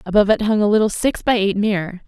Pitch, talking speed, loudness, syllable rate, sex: 205 Hz, 260 wpm, -17 LUFS, 6.8 syllables/s, female